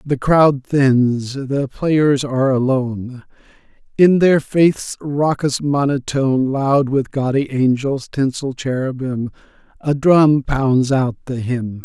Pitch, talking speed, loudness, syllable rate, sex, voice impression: 135 Hz, 120 wpm, -17 LUFS, 3.5 syllables/s, male, masculine, adult-like, slightly muffled, sincere, slightly calm, slightly kind